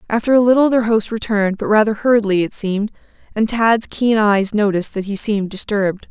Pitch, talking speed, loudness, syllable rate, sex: 210 Hz, 195 wpm, -16 LUFS, 6.0 syllables/s, female